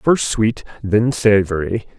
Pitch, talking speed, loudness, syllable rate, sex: 110 Hz, 120 wpm, -17 LUFS, 3.6 syllables/s, male